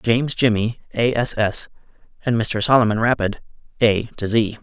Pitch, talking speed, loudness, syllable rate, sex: 115 Hz, 155 wpm, -19 LUFS, 5.0 syllables/s, male